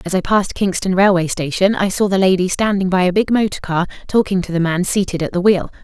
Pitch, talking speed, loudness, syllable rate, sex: 185 Hz, 245 wpm, -16 LUFS, 6.1 syllables/s, female